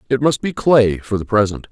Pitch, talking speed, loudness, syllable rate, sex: 115 Hz, 245 wpm, -16 LUFS, 5.3 syllables/s, male